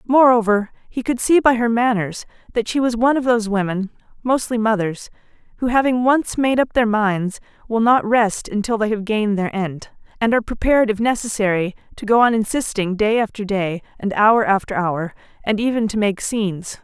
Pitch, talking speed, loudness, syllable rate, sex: 220 Hz, 185 wpm, -19 LUFS, 5.4 syllables/s, female